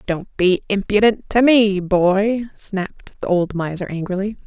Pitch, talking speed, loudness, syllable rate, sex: 195 Hz, 150 wpm, -18 LUFS, 4.3 syllables/s, female